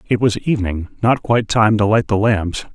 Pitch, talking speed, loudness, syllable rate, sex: 105 Hz, 220 wpm, -17 LUFS, 5.2 syllables/s, male